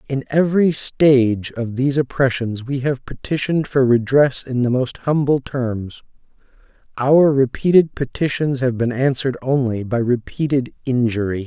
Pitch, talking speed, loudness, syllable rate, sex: 130 Hz, 135 wpm, -18 LUFS, 4.7 syllables/s, male